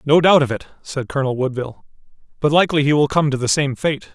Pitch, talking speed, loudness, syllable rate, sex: 145 Hz, 230 wpm, -18 LUFS, 6.7 syllables/s, male